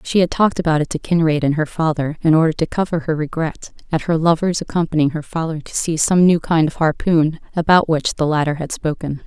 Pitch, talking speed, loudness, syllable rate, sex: 160 Hz, 225 wpm, -18 LUFS, 5.7 syllables/s, female